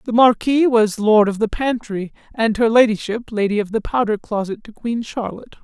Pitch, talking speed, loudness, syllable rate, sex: 220 Hz, 190 wpm, -18 LUFS, 5.2 syllables/s, male